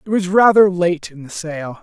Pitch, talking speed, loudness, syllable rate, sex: 180 Hz, 230 wpm, -15 LUFS, 4.6 syllables/s, male